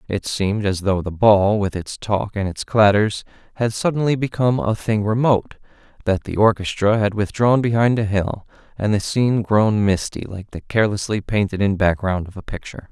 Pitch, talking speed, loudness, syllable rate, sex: 105 Hz, 180 wpm, -19 LUFS, 5.3 syllables/s, male